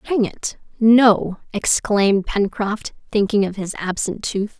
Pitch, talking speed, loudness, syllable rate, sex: 210 Hz, 130 wpm, -19 LUFS, 3.8 syllables/s, female